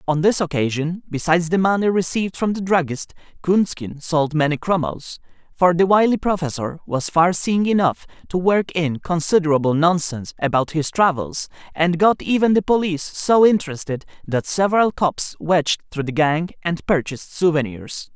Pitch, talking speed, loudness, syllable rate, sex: 170 Hz, 155 wpm, -19 LUFS, 5.0 syllables/s, male